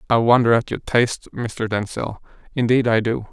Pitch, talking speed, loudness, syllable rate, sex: 115 Hz, 180 wpm, -20 LUFS, 5.2 syllables/s, male